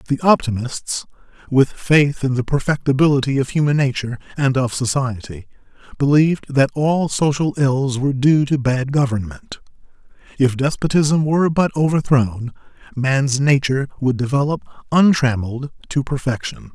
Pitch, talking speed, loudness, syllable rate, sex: 135 Hz, 125 wpm, -18 LUFS, 5.0 syllables/s, male